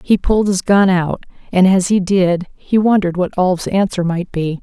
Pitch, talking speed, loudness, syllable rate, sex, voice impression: 185 Hz, 210 wpm, -15 LUFS, 4.8 syllables/s, female, feminine, adult-like, tensed, slightly dark, soft, clear, intellectual, calm, reassuring, elegant, slightly lively, slightly sharp, slightly modest